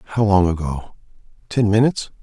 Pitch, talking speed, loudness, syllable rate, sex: 100 Hz, 135 wpm, -18 LUFS, 6.3 syllables/s, male